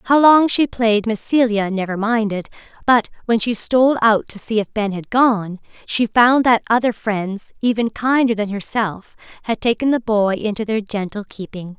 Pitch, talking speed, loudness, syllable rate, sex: 220 Hz, 185 wpm, -18 LUFS, 4.6 syllables/s, female